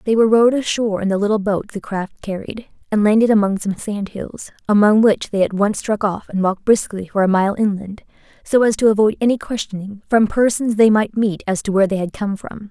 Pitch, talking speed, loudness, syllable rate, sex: 210 Hz, 230 wpm, -17 LUFS, 5.8 syllables/s, female